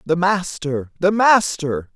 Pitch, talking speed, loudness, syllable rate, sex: 170 Hz, 125 wpm, -18 LUFS, 3.6 syllables/s, male